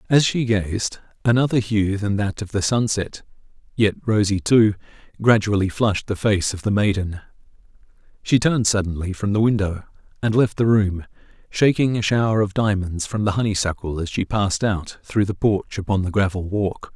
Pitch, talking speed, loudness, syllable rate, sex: 105 Hz, 175 wpm, -21 LUFS, 5.1 syllables/s, male